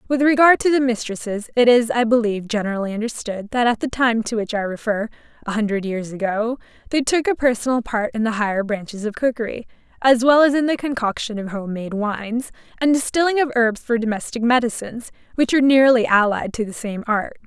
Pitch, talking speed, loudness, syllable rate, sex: 230 Hz, 200 wpm, -19 LUFS, 5.9 syllables/s, female